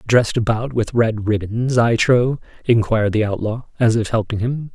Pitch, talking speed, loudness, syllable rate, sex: 115 Hz, 175 wpm, -18 LUFS, 4.9 syllables/s, male